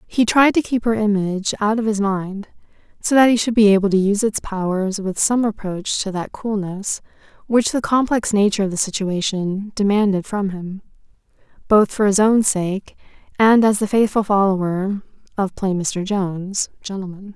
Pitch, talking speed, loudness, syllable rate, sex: 205 Hz, 175 wpm, -19 LUFS, 4.9 syllables/s, female